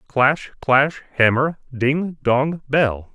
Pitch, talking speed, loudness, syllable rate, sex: 140 Hz, 115 wpm, -19 LUFS, 2.8 syllables/s, male